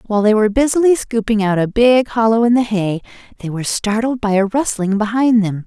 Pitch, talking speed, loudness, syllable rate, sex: 220 Hz, 210 wpm, -15 LUFS, 5.9 syllables/s, female